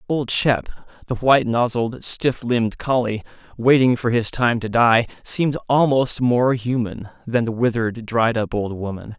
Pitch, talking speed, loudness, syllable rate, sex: 120 Hz, 165 wpm, -20 LUFS, 4.6 syllables/s, male